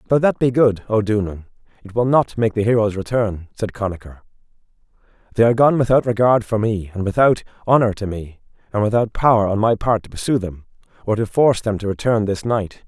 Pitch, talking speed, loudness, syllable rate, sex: 110 Hz, 205 wpm, -18 LUFS, 6.0 syllables/s, male